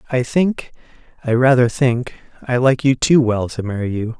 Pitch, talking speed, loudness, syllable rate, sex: 125 Hz, 170 wpm, -17 LUFS, 4.9 syllables/s, male